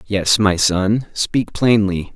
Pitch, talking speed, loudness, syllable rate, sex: 100 Hz, 140 wpm, -16 LUFS, 3.1 syllables/s, male